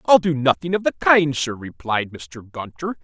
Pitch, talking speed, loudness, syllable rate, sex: 145 Hz, 200 wpm, -19 LUFS, 4.5 syllables/s, male